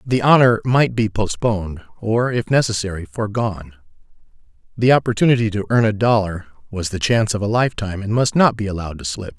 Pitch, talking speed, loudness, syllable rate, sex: 110 Hz, 180 wpm, -18 LUFS, 6.2 syllables/s, male